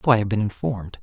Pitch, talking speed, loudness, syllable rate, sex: 105 Hz, 295 wpm, -23 LUFS, 7.5 syllables/s, male